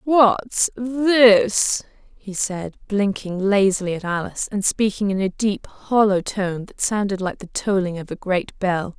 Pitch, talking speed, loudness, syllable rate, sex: 200 Hz, 160 wpm, -20 LUFS, 3.8 syllables/s, female